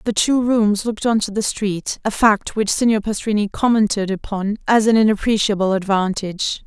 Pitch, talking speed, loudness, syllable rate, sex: 210 Hz, 155 wpm, -18 LUFS, 5.2 syllables/s, female